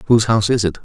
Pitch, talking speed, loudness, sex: 110 Hz, 285 wpm, -16 LUFS, male